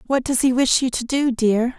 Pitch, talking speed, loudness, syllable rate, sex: 250 Hz, 270 wpm, -19 LUFS, 4.9 syllables/s, female